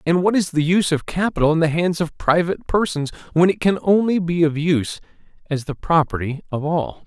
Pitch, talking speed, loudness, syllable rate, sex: 165 Hz, 210 wpm, -19 LUFS, 5.7 syllables/s, male